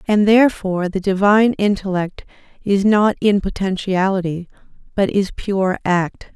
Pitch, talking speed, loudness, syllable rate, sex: 195 Hz, 125 wpm, -17 LUFS, 4.6 syllables/s, female